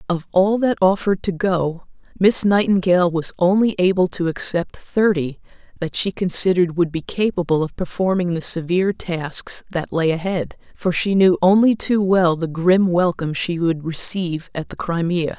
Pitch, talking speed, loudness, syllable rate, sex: 180 Hz, 170 wpm, -19 LUFS, 4.9 syllables/s, female